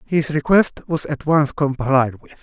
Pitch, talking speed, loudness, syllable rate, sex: 145 Hz, 175 wpm, -19 LUFS, 4.1 syllables/s, male